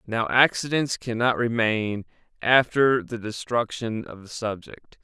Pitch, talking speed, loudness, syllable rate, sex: 115 Hz, 120 wpm, -23 LUFS, 4.0 syllables/s, male